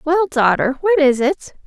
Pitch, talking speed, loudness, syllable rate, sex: 300 Hz, 180 wpm, -16 LUFS, 4.1 syllables/s, female